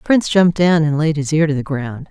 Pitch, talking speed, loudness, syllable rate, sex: 155 Hz, 315 wpm, -16 LUFS, 6.3 syllables/s, female